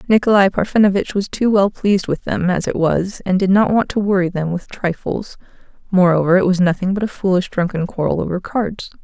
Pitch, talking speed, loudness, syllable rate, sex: 190 Hz, 205 wpm, -17 LUFS, 5.6 syllables/s, female